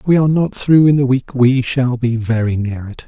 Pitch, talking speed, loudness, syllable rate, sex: 130 Hz, 275 wpm, -15 LUFS, 5.3 syllables/s, male